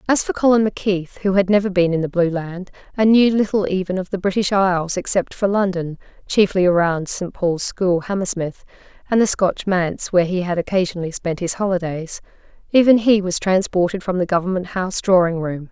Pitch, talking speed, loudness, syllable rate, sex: 185 Hz, 180 wpm, -19 LUFS, 5.7 syllables/s, female